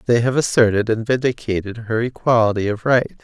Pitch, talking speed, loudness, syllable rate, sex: 115 Hz, 165 wpm, -18 LUFS, 5.5 syllables/s, male